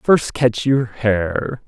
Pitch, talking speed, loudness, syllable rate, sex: 120 Hz, 145 wpm, -18 LUFS, 2.5 syllables/s, male